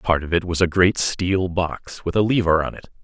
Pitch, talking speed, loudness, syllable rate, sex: 90 Hz, 255 wpm, -20 LUFS, 4.9 syllables/s, male